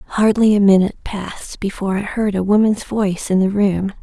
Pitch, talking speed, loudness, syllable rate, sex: 200 Hz, 195 wpm, -17 LUFS, 5.4 syllables/s, female